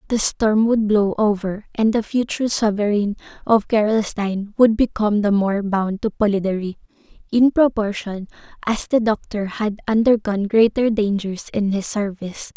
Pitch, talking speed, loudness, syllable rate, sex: 210 Hz, 145 wpm, -19 LUFS, 4.8 syllables/s, female